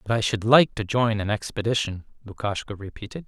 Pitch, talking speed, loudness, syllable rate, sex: 110 Hz, 185 wpm, -23 LUFS, 5.7 syllables/s, male